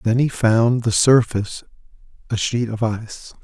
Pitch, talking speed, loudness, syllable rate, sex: 115 Hz, 155 wpm, -18 LUFS, 4.6 syllables/s, male